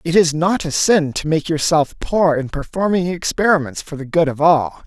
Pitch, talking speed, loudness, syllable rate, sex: 165 Hz, 210 wpm, -17 LUFS, 4.8 syllables/s, male